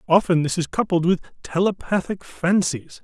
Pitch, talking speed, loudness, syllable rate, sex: 175 Hz, 140 wpm, -22 LUFS, 4.9 syllables/s, male